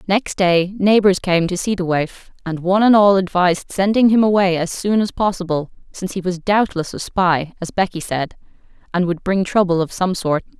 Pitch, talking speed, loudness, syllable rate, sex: 185 Hz, 205 wpm, -17 LUFS, 5.1 syllables/s, female